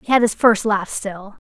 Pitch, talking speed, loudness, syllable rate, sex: 210 Hz, 245 wpm, -18 LUFS, 4.6 syllables/s, female